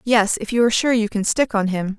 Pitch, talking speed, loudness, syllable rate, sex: 220 Hz, 305 wpm, -19 LUFS, 5.9 syllables/s, female